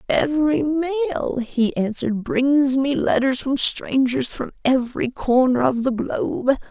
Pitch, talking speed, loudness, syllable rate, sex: 260 Hz, 125 wpm, -20 LUFS, 4.3 syllables/s, female